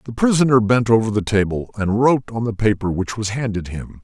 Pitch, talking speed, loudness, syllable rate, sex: 110 Hz, 225 wpm, -18 LUFS, 5.9 syllables/s, male